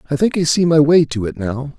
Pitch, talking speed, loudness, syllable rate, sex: 145 Hz, 305 wpm, -15 LUFS, 5.7 syllables/s, male